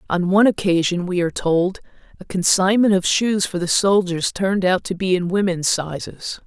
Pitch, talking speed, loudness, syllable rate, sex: 185 Hz, 185 wpm, -19 LUFS, 5.1 syllables/s, female